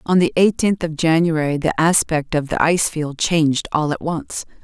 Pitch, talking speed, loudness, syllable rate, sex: 160 Hz, 195 wpm, -18 LUFS, 4.9 syllables/s, female